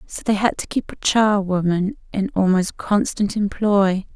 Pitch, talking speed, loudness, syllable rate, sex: 200 Hz, 160 wpm, -20 LUFS, 4.3 syllables/s, female